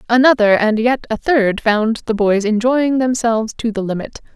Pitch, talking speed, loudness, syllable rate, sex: 230 Hz, 180 wpm, -16 LUFS, 4.7 syllables/s, female